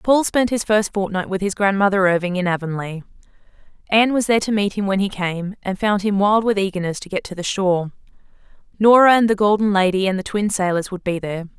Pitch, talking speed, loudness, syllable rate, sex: 195 Hz, 220 wpm, -19 LUFS, 6.1 syllables/s, female